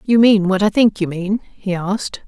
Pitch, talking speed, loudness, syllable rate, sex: 200 Hz, 235 wpm, -17 LUFS, 5.0 syllables/s, female